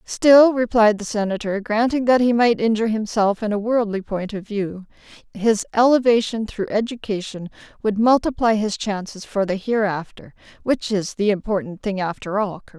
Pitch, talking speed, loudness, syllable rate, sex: 215 Hz, 160 wpm, -20 LUFS, 5.1 syllables/s, female